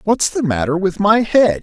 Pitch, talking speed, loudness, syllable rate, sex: 185 Hz, 220 wpm, -15 LUFS, 4.6 syllables/s, male